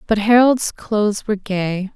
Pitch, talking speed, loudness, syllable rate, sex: 210 Hz, 155 wpm, -17 LUFS, 4.5 syllables/s, female